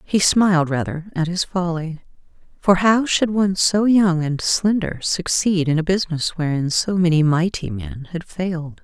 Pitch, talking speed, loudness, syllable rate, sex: 175 Hz, 170 wpm, -19 LUFS, 4.6 syllables/s, female